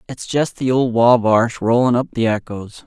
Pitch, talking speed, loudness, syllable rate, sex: 120 Hz, 190 wpm, -17 LUFS, 4.6 syllables/s, male